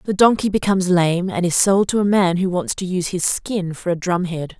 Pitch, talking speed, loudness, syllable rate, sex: 185 Hz, 250 wpm, -18 LUFS, 5.4 syllables/s, female